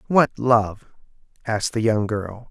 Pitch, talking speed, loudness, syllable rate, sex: 115 Hz, 145 wpm, -21 LUFS, 3.9 syllables/s, male